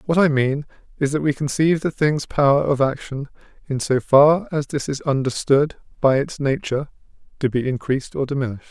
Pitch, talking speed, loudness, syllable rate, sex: 140 Hz, 185 wpm, -20 LUFS, 5.7 syllables/s, male